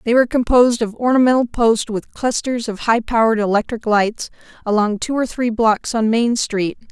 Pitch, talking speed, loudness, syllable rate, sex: 230 Hz, 180 wpm, -17 LUFS, 5.2 syllables/s, female